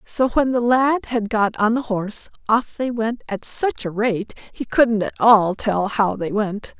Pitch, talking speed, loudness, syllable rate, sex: 225 Hz, 210 wpm, -20 LUFS, 4.1 syllables/s, female